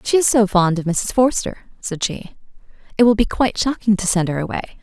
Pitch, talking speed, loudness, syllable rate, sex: 210 Hz, 225 wpm, -18 LUFS, 6.0 syllables/s, female